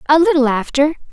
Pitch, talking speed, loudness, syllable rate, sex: 290 Hz, 160 wpm, -15 LUFS, 6.3 syllables/s, female